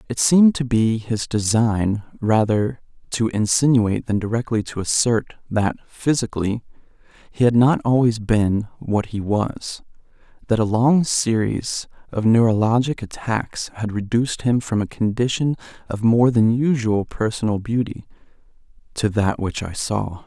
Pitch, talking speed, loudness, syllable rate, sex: 115 Hz, 135 wpm, -20 LUFS, 4.3 syllables/s, male